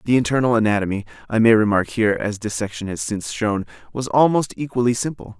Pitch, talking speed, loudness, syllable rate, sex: 110 Hz, 180 wpm, -20 LUFS, 6.4 syllables/s, male